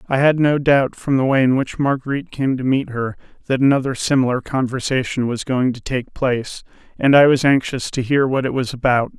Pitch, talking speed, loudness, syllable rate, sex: 130 Hz, 215 wpm, -18 LUFS, 5.5 syllables/s, male